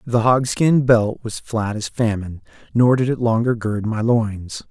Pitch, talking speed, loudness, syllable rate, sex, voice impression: 115 Hz, 180 wpm, -19 LUFS, 4.2 syllables/s, male, masculine, adult-like, slightly powerful, slightly soft, fluent, cool, intellectual, slightly mature, friendly, wild, lively, kind